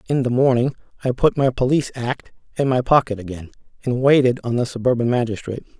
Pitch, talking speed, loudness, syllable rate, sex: 125 Hz, 185 wpm, -20 LUFS, 6.2 syllables/s, male